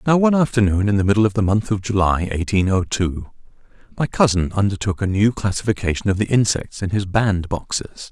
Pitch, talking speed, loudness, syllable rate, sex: 100 Hz, 190 wpm, -19 LUFS, 5.7 syllables/s, male